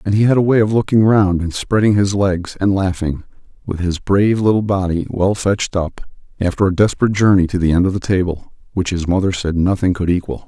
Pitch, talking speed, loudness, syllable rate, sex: 95 Hz, 225 wpm, -16 LUFS, 5.9 syllables/s, male